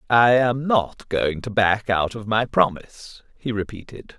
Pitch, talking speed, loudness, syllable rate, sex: 110 Hz, 170 wpm, -21 LUFS, 4.2 syllables/s, male